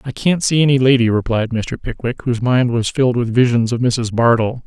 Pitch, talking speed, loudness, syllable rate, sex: 120 Hz, 220 wpm, -16 LUFS, 5.6 syllables/s, male